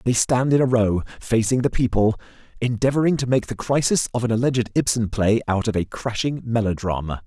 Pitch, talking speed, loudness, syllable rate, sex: 115 Hz, 190 wpm, -21 LUFS, 5.7 syllables/s, male